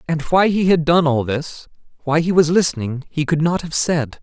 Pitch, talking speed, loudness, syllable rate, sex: 155 Hz, 225 wpm, -17 LUFS, 5.0 syllables/s, male